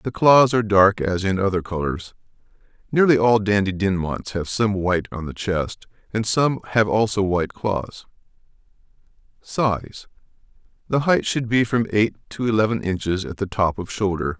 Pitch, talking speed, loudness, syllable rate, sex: 105 Hz, 160 wpm, -21 LUFS, 3.4 syllables/s, male